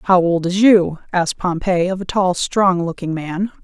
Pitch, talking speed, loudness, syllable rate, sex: 180 Hz, 200 wpm, -17 LUFS, 4.4 syllables/s, female